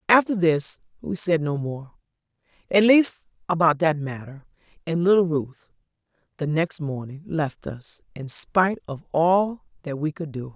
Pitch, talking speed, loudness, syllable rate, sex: 160 Hz, 155 wpm, -23 LUFS, 4.4 syllables/s, female